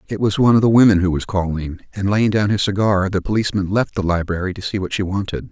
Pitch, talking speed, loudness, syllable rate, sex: 100 Hz, 260 wpm, -18 LUFS, 6.6 syllables/s, male